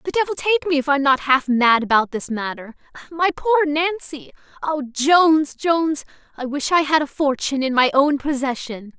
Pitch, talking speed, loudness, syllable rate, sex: 290 Hz, 195 wpm, -19 LUFS, 5.2 syllables/s, female